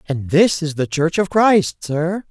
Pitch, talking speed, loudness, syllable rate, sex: 165 Hz, 210 wpm, -17 LUFS, 3.8 syllables/s, male